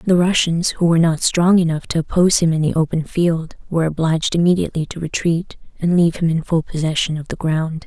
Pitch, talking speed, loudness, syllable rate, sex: 165 Hz, 215 wpm, -18 LUFS, 6.1 syllables/s, female